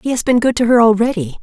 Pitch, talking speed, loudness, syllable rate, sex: 230 Hz, 295 wpm, -13 LUFS, 6.6 syllables/s, female